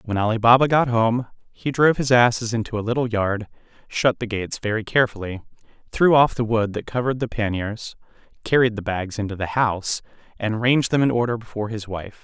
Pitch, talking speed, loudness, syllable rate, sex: 115 Hz, 195 wpm, -21 LUFS, 6.0 syllables/s, male